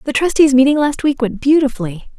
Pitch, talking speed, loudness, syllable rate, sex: 265 Hz, 190 wpm, -14 LUFS, 6.0 syllables/s, female